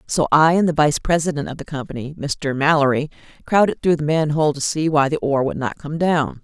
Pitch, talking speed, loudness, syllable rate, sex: 150 Hz, 225 wpm, -19 LUFS, 5.8 syllables/s, female